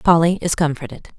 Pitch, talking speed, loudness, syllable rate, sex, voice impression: 160 Hz, 150 wpm, -18 LUFS, 6.2 syllables/s, female, feminine, adult-like, slightly intellectual, slightly calm, slightly elegant